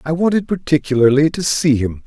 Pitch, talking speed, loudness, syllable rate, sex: 150 Hz, 175 wpm, -16 LUFS, 5.6 syllables/s, male